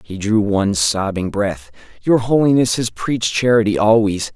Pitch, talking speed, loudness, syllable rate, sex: 105 Hz, 150 wpm, -17 LUFS, 3.9 syllables/s, male